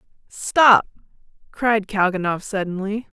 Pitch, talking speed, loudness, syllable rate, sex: 205 Hz, 75 wpm, -19 LUFS, 4.3 syllables/s, female